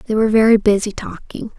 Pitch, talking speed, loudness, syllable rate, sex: 215 Hz, 190 wpm, -15 LUFS, 6.0 syllables/s, female